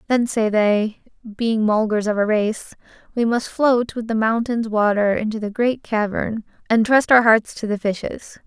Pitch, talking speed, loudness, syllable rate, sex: 220 Hz, 185 wpm, -19 LUFS, 4.4 syllables/s, female